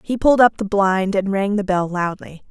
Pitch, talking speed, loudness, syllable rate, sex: 200 Hz, 240 wpm, -18 LUFS, 5.1 syllables/s, female